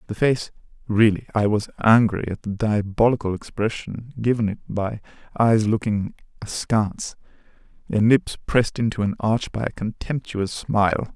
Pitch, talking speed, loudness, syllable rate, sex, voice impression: 110 Hz, 135 wpm, -22 LUFS, 4.9 syllables/s, male, masculine, very adult-like, slightly thick, slightly halting, sincere, slightly friendly